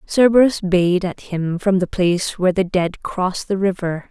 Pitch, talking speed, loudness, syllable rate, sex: 185 Hz, 190 wpm, -18 LUFS, 4.7 syllables/s, female